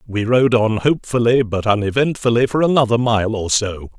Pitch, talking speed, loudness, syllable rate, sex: 115 Hz, 165 wpm, -17 LUFS, 5.3 syllables/s, male